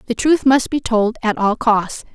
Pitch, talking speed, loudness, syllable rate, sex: 235 Hz, 225 wpm, -16 LUFS, 4.3 syllables/s, female